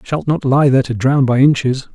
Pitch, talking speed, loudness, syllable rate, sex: 135 Hz, 245 wpm, -14 LUFS, 5.5 syllables/s, male